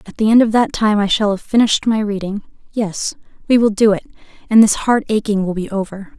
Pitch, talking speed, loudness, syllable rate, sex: 210 Hz, 225 wpm, -16 LUFS, 5.9 syllables/s, female